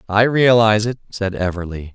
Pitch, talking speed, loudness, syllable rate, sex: 105 Hz, 155 wpm, -17 LUFS, 5.5 syllables/s, male